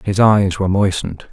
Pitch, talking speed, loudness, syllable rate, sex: 95 Hz, 180 wpm, -16 LUFS, 5.8 syllables/s, male